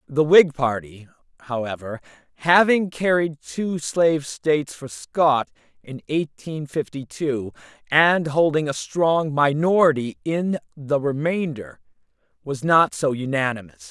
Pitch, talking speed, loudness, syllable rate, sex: 150 Hz, 115 wpm, -21 LUFS, 4.0 syllables/s, male